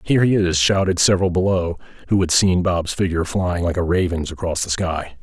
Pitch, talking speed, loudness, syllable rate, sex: 90 Hz, 205 wpm, -19 LUFS, 5.7 syllables/s, male